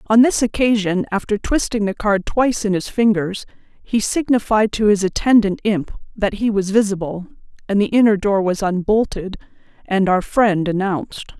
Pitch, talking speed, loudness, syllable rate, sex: 205 Hz, 165 wpm, -18 LUFS, 5.0 syllables/s, female